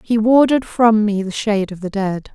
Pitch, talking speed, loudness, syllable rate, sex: 215 Hz, 230 wpm, -16 LUFS, 5.0 syllables/s, female